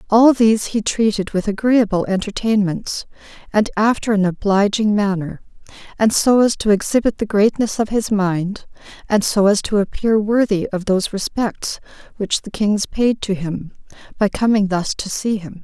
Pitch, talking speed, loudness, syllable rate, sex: 205 Hz, 165 wpm, -18 LUFS, 4.7 syllables/s, female